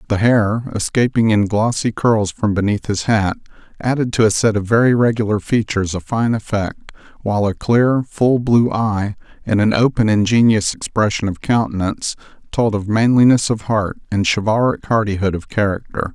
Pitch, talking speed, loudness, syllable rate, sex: 110 Hz, 165 wpm, -17 LUFS, 5.1 syllables/s, male